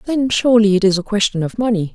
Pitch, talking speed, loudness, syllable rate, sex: 210 Hz, 245 wpm, -16 LUFS, 6.6 syllables/s, female